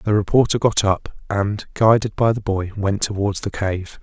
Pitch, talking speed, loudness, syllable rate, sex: 105 Hz, 195 wpm, -20 LUFS, 4.5 syllables/s, male